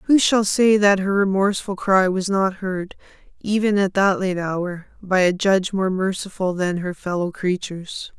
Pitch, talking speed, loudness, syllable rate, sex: 190 Hz, 175 wpm, -20 LUFS, 4.5 syllables/s, female